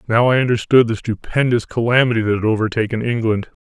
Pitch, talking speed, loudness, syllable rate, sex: 115 Hz, 165 wpm, -17 LUFS, 6.2 syllables/s, male